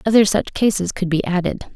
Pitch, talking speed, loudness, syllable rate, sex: 195 Hz, 205 wpm, -19 LUFS, 5.6 syllables/s, female